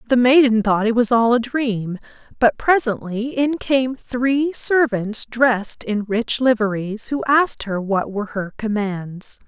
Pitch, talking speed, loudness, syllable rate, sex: 230 Hz, 160 wpm, -19 LUFS, 4.0 syllables/s, female